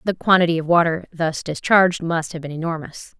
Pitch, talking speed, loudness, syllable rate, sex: 165 Hz, 190 wpm, -19 LUFS, 5.7 syllables/s, female